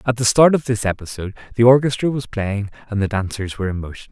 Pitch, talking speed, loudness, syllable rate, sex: 110 Hz, 235 wpm, -19 LUFS, 6.7 syllables/s, male